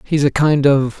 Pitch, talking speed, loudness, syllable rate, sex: 140 Hz, 240 wpm, -15 LUFS, 4.5 syllables/s, male